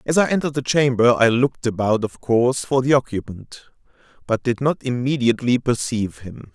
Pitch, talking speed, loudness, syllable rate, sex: 125 Hz, 175 wpm, -19 LUFS, 5.7 syllables/s, male